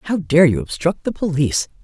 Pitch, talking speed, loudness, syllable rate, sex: 165 Hz, 195 wpm, -18 LUFS, 5.4 syllables/s, female